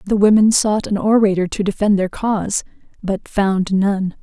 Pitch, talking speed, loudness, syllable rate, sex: 200 Hz, 170 wpm, -17 LUFS, 4.6 syllables/s, female